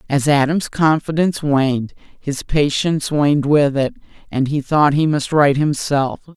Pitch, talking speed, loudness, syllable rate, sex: 145 Hz, 150 wpm, -17 LUFS, 4.8 syllables/s, female